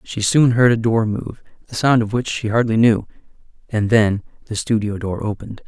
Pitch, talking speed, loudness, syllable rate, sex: 110 Hz, 200 wpm, -18 LUFS, 5.2 syllables/s, male